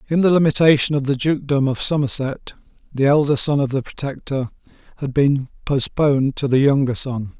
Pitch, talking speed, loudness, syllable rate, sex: 140 Hz, 170 wpm, -18 LUFS, 5.5 syllables/s, male